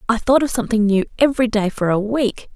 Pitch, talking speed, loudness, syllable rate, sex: 230 Hz, 235 wpm, -18 LUFS, 6.3 syllables/s, female